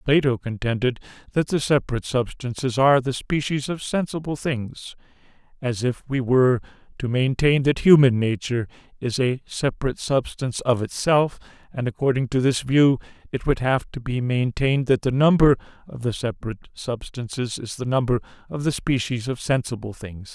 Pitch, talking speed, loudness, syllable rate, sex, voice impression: 130 Hz, 160 wpm, -22 LUFS, 5.3 syllables/s, male, very masculine, very adult-like, old, very thick, tensed, powerful, slightly dark, soft, muffled, slightly fluent, slightly cool, very intellectual, sincere, slightly calm, friendly, slightly reassuring, unique, slightly elegant, slightly wild, slightly sweet, lively, very kind, slightly intense, modest